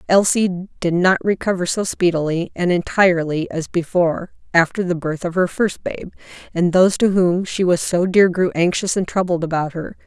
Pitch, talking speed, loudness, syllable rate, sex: 180 Hz, 185 wpm, -18 LUFS, 5.2 syllables/s, female